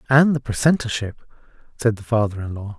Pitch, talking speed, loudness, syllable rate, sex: 115 Hz, 170 wpm, -21 LUFS, 6.2 syllables/s, male